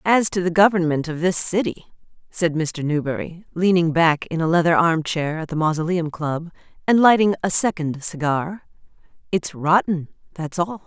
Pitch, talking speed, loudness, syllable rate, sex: 170 Hz, 160 wpm, -20 LUFS, 4.8 syllables/s, female